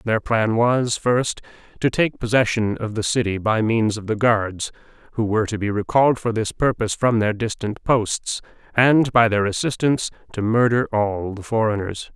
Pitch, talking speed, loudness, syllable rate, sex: 110 Hz, 180 wpm, -20 LUFS, 4.8 syllables/s, male